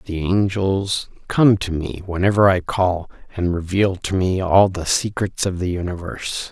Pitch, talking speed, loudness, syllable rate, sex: 95 Hz, 165 wpm, -20 LUFS, 4.4 syllables/s, male